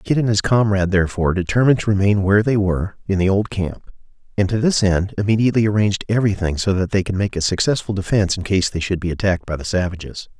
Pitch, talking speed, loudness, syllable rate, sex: 100 Hz, 225 wpm, -18 LUFS, 7.0 syllables/s, male